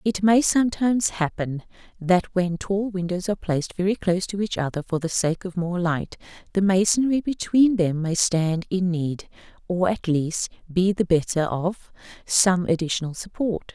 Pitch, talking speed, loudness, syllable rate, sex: 185 Hz, 170 wpm, -23 LUFS, 4.7 syllables/s, female